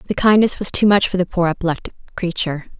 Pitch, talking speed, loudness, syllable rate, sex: 180 Hz, 215 wpm, -18 LUFS, 7.0 syllables/s, female